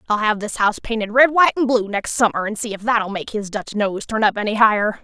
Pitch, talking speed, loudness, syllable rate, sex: 220 Hz, 275 wpm, -19 LUFS, 6.1 syllables/s, female